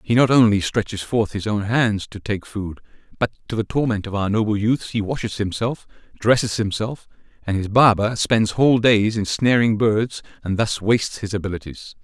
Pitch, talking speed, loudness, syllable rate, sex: 105 Hz, 190 wpm, -20 LUFS, 5.1 syllables/s, male